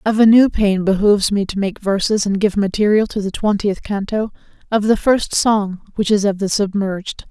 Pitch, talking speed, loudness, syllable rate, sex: 205 Hz, 205 wpm, -17 LUFS, 5.1 syllables/s, female